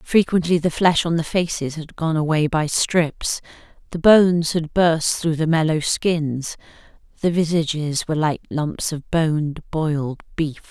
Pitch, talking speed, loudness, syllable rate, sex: 160 Hz, 155 wpm, -20 LUFS, 4.3 syllables/s, female